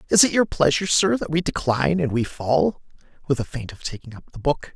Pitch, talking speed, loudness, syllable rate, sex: 145 Hz, 240 wpm, -22 LUFS, 6.0 syllables/s, male